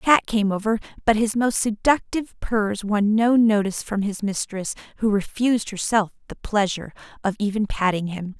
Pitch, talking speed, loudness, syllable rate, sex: 210 Hz, 165 wpm, -22 LUFS, 5.2 syllables/s, female